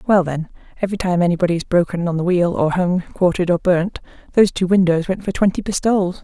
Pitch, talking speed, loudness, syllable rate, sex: 180 Hz, 210 wpm, -18 LUFS, 6.5 syllables/s, female